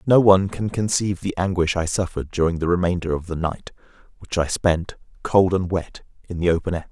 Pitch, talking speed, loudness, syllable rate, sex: 90 Hz, 210 wpm, -21 LUFS, 5.8 syllables/s, male